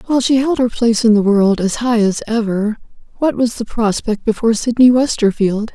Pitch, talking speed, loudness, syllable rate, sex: 225 Hz, 200 wpm, -15 LUFS, 5.5 syllables/s, female